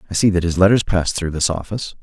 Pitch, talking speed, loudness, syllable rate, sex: 90 Hz, 265 wpm, -18 LUFS, 6.7 syllables/s, male